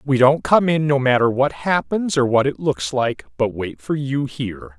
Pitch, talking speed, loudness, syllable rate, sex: 130 Hz, 225 wpm, -19 LUFS, 4.6 syllables/s, male